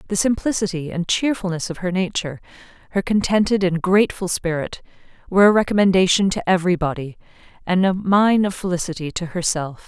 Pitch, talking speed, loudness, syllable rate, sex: 185 Hz, 150 wpm, -19 LUFS, 6.0 syllables/s, female